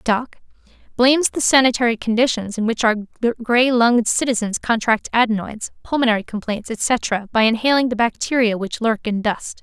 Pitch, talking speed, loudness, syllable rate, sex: 230 Hz, 145 wpm, -18 LUFS, 5.1 syllables/s, female